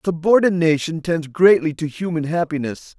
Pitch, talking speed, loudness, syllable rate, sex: 165 Hz, 120 wpm, -18 LUFS, 4.9 syllables/s, male